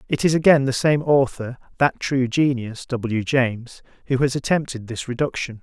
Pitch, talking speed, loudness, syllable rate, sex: 130 Hz, 170 wpm, -21 LUFS, 4.8 syllables/s, male